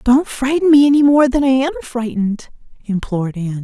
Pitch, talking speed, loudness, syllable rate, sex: 250 Hz, 180 wpm, -15 LUFS, 5.9 syllables/s, female